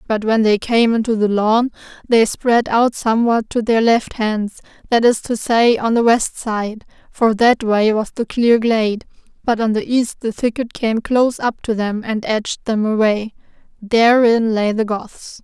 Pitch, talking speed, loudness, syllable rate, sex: 225 Hz, 190 wpm, -16 LUFS, 4.3 syllables/s, female